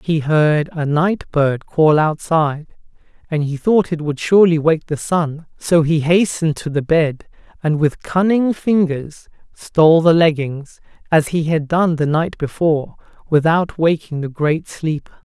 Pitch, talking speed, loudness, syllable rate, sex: 160 Hz, 160 wpm, -17 LUFS, 4.3 syllables/s, male